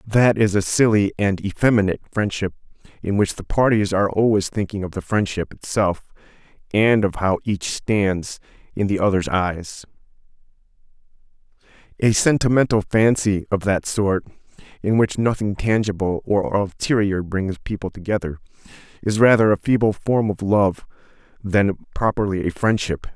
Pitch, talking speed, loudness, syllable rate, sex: 100 Hz, 135 wpm, -20 LUFS, 4.8 syllables/s, male